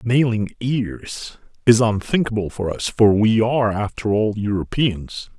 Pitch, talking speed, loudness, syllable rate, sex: 110 Hz, 135 wpm, -19 LUFS, 4.1 syllables/s, male